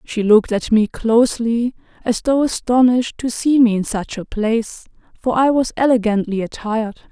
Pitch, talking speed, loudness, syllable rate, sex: 230 Hz, 170 wpm, -17 LUFS, 5.1 syllables/s, female